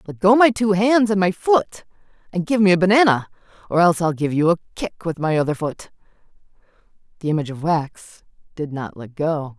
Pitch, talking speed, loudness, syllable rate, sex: 175 Hz, 200 wpm, -19 LUFS, 5.6 syllables/s, female